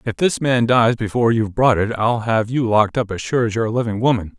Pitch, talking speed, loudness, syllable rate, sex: 115 Hz, 275 wpm, -18 LUFS, 6.4 syllables/s, male